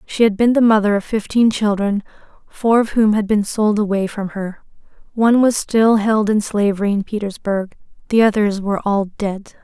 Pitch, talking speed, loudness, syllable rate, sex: 210 Hz, 185 wpm, -17 LUFS, 5.0 syllables/s, female